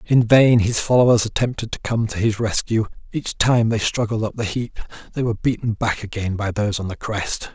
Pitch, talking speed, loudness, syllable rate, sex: 110 Hz, 215 wpm, -20 LUFS, 5.4 syllables/s, male